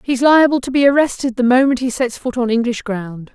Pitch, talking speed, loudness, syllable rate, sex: 250 Hz, 235 wpm, -15 LUFS, 5.5 syllables/s, female